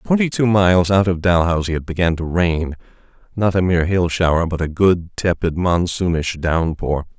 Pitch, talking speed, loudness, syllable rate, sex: 90 Hz, 165 wpm, -18 LUFS, 5.1 syllables/s, male